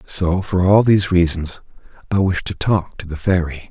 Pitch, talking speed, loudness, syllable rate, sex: 90 Hz, 195 wpm, -17 LUFS, 4.8 syllables/s, male